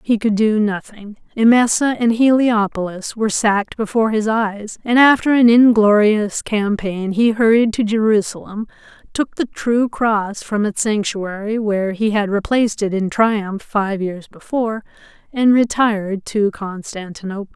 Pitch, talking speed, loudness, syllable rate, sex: 215 Hz, 145 wpm, -17 LUFS, 4.5 syllables/s, female